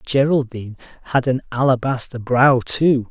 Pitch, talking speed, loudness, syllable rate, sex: 125 Hz, 115 wpm, -18 LUFS, 4.7 syllables/s, male